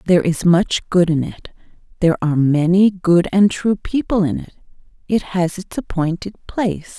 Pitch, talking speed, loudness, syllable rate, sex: 180 Hz, 170 wpm, -17 LUFS, 4.9 syllables/s, female